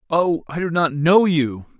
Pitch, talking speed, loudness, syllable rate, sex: 160 Hz, 200 wpm, -19 LUFS, 4.2 syllables/s, male